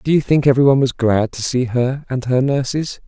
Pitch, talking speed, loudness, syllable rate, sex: 130 Hz, 235 wpm, -17 LUFS, 5.5 syllables/s, male